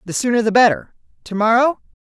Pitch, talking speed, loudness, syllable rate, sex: 230 Hz, 145 wpm, -16 LUFS, 6.2 syllables/s, female